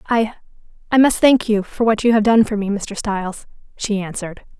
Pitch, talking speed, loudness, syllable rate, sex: 215 Hz, 195 wpm, -17 LUFS, 5.5 syllables/s, female